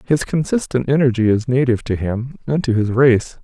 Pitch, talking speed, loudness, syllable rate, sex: 125 Hz, 190 wpm, -17 LUFS, 5.3 syllables/s, male